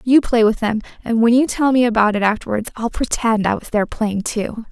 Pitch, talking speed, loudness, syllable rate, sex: 225 Hz, 240 wpm, -18 LUFS, 5.6 syllables/s, female